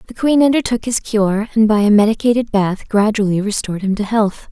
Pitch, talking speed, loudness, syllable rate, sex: 215 Hz, 200 wpm, -15 LUFS, 5.4 syllables/s, female